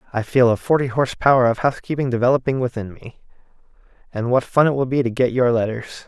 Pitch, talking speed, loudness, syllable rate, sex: 125 Hz, 205 wpm, -19 LUFS, 6.5 syllables/s, male